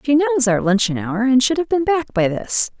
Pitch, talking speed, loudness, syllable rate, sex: 250 Hz, 255 wpm, -17 LUFS, 5.5 syllables/s, female